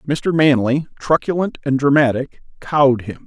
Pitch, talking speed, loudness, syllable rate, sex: 140 Hz, 130 wpm, -17 LUFS, 4.7 syllables/s, male